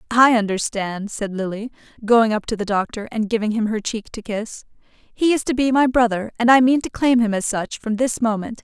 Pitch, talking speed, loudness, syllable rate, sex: 225 Hz, 230 wpm, -19 LUFS, 5.0 syllables/s, female